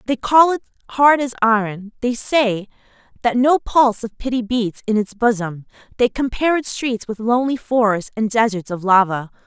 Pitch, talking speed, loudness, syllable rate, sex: 230 Hz, 175 wpm, -18 LUFS, 5.1 syllables/s, female